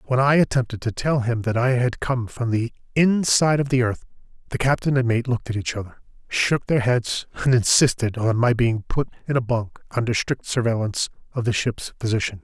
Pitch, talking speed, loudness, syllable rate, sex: 120 Hz, 210 wpm, -22 LUFS, 5.5 syllables/s, male